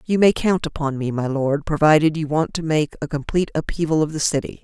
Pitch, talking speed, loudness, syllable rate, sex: 155 Hz, 235 wpm, -20 LUFS, 5.9 syllables/s, female